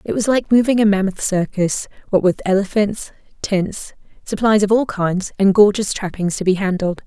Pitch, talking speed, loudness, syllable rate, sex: 200 Hz, 180 wpm, -17 LUFS, 5.0 syllables/s, female